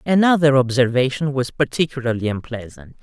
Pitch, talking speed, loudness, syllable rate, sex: 135 Hz, 100 wpm, -18 LUFS, 5.6 syllables/s, female